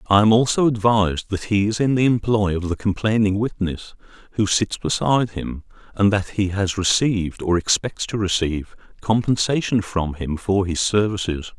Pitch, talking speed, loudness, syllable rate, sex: 100 Hz, 170 wpm, -20 LUFS, 5.0 syllables/s, male